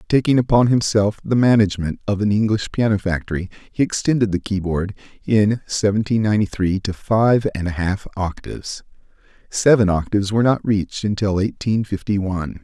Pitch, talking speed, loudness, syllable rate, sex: 105 Hz, 155 wpm, -19 LUFS, 5.5 syllables/s, male